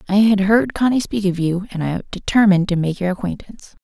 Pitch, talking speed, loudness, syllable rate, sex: 195 Hz, 220 wpm, -18 LUFS, 6.2 syllables/s, female